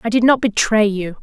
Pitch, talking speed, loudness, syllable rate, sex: 220 Hz, 245 wpm, -16 LUFS, 5.5 syllables/s, female